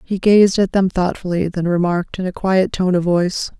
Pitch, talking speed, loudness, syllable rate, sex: 185 Hz, 215 wpm, -17 LUFS, 5.3 syllables/s, female